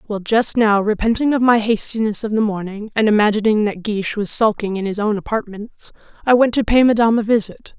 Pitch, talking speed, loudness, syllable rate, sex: 215 Hz, 210 wpm, -17 LUFS, 5.8 syllables/s, female